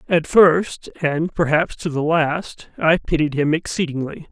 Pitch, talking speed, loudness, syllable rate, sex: 160 Hz, 155 wpm, -19 LUFS, 4.0 syllables/s, male